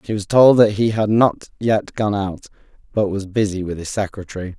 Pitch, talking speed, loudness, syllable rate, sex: 105 Hz, 210 wpm, -18 LUFS, 5.2 syllables/s, male